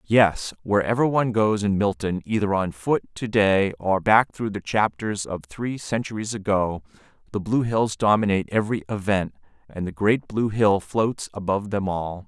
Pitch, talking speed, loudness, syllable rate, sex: 105 Hz, 170 wpm, -23 LUFS, 4.8 syllables/s, male